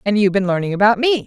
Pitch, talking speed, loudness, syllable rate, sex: 210 Hz, 285 wpm, -16 LUFS, 7.7 syllables/s, female